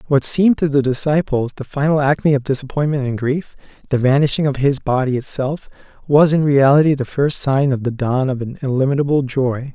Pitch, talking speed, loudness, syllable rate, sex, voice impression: 140 Hz, 190 wpm, -17 LUFS, 5.6 syllables/s, male, masculine, adult-like, slightly relaxed, powerful, slightly soft, slightly muffled, intellectual, calm, friendly, reassuring, slightly wild, kind, modest